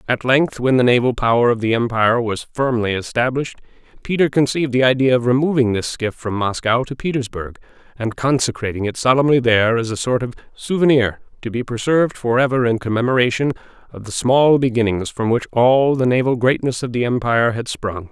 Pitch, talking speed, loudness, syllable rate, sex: 120 Hz, 180 wpm, -18 LUFS, 5.8 syllables/s, male